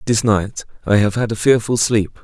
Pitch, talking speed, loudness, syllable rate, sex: 110 Hz, 215 wpm, -17 LUFS, 4.9 syllables/s, male